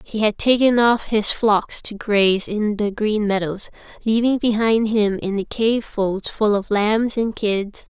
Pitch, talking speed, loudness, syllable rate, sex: 215 Hz, 180 wpm, -19 LUFS, 3.9 syllables/s, female